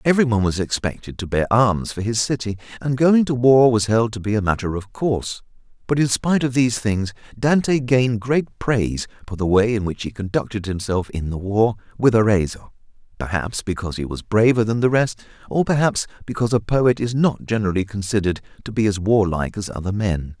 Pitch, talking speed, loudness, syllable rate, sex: 110 Hz, 200 wpm, -20 LUFS, 5.7 syllables/s, male